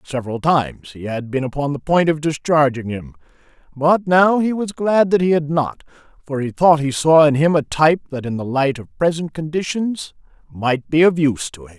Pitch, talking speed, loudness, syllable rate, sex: 145 Hz, 215 wpm, -18 LUFS, 5.2 syllables/s, male